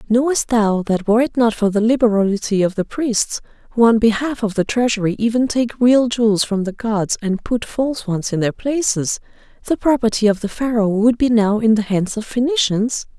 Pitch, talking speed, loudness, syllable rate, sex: 225 Hz, 205 wpm, -17 LUFS, 5.3 syllables/s, female